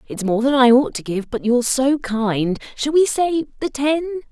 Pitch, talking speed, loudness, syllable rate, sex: 260 Hz, 210 wpm, -18 LUFS, 4.7 syllables/s, female